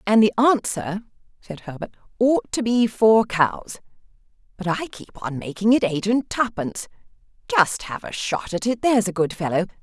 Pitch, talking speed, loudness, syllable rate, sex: 210 Hz, 175 wpm, -21 LUFS, 4.9 syllables/s, female